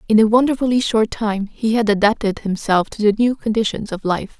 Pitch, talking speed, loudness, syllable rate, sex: 215 Hz, 205 wpm, -18 LUFS, 5.5 syllables/s, female